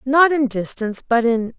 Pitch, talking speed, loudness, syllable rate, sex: 255 Hz, 190 wpm, -18 LUFS, 4.9 syllables/s, female